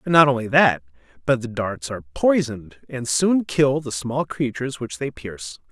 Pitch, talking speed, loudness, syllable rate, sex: 125 Hz, 180 wpm, -21 LUFS, 4.9 syllables/s, male